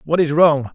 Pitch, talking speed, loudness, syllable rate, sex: 155 Hz, 240 wpm, -15 LUFS, 4.7 syllables/s, male